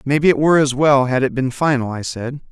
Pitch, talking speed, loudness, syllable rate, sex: 135 Hz, 260 wpm, -16 LUFS, 6.0 syllables/s, male